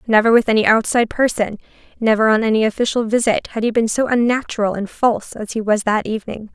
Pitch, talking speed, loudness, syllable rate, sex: 225 Hz, 200 wpm, -17 LUFS, 6.3 syllables/s, female